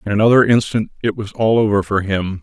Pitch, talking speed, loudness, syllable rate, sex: 105 Hz, 220 wpm, -16 LUFS, 5.9 syllables/s, male